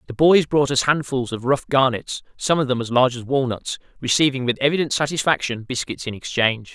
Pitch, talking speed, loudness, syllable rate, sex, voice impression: 130 Hz, 195 wpm, -20 LUFS, 5.8 syllables/s, male, very masculine, adult-like, slightly thick, tensed, slightly powerful, slightly bright, very hard, clear, fluent, slightly raspy, cool, slightly intellectual, refreshing, very sincere, slightly calm, friendly, reassuring, slightly unique, elegant, kind, slightly modest